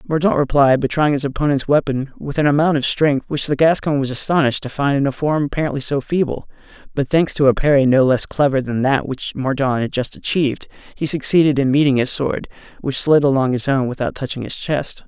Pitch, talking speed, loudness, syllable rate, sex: 140 Hz, 220 wpm, -18 LUFS, 5.8 syllables/s, male